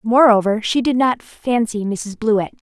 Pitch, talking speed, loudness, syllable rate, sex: 225 Hz, 175 wpm, -17 LUFS, 4.5 syllables/s, female